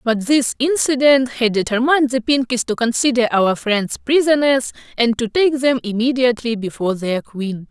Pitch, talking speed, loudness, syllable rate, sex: 245 Hz, 155 wpm, -17 LUFS, 5.0 syllables/s, female